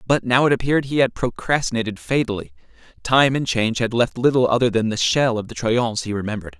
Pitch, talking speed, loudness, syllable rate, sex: 120 Hz, 210 wpm, -20 LUFS, 6.2 syllables/s, male